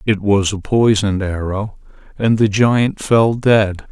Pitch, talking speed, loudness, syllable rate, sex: 105 Hz, 155 wpm, -16 LUFS, 3.8 syllables/s, male